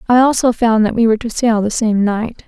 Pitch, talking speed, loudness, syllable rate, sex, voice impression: 225 Hz, 265 wpm, -14 LUFS, 5.7 syllables/s, female, feminine, slightly young, soft, cute, calm, friendly, slightly kind